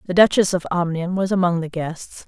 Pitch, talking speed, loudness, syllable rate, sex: 175 Hz, 210 wpm, -20 LUFS, 5.3 syllables/s, female